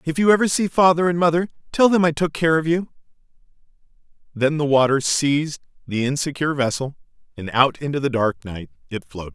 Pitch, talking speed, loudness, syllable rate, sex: 150 Hz, 185 wpm, -20 LUFS, 5.9 syllables/s, male